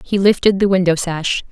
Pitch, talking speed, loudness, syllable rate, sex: 185 Hz, 195 wpm, -15 LUFS, 5.2 syllables/s, female